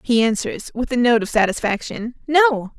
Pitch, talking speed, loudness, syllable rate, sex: 240 Hz, 170 wpm, -19 LUFS, 4.7 syllables/s, female